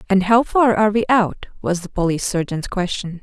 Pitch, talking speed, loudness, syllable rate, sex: 200 Hz, 205 wpm, -18 LUFS, 5.6 syllables/s, female